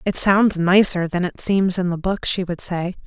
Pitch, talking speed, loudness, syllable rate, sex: 185 Hz, 235 wpm, -19 LUFS, 4.6 syllables/s, female